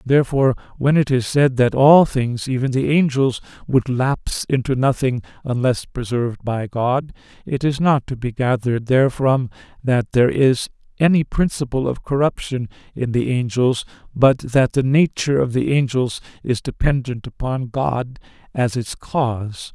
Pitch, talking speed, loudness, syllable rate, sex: 130 Hz, 150 wpm, -19 LUFS, 4.7 syllables/s, male